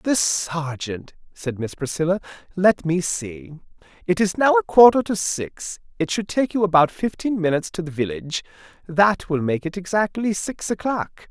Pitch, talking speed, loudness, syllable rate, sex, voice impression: 175 Hz, 165 wpm, -21 LUFS, 4.7 syllables/s, male, masculine, slightly adult-like, thick, tensed, slightly weak, slightly bright, slightly hard, clear, fluent, cool, intellectual, very refreshing, sincere, calm, slightly mature, friendly, reassuring, slightly unique, elegant, wild, slightly sweet, lively, kind, slightly intense